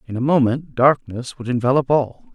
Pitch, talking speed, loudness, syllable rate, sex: 130 Hz, 180 wpm, -18 LUFS, 5.2 syllables/s, male